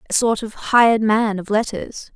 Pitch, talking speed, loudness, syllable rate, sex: 215 Hz, 195 wpm, -18 LUFS, 4.6 syllables/s, female